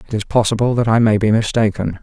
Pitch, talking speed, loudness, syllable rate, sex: 110 Hz, 235 wpm, -16 LUFS, 6.4 syllables/s, male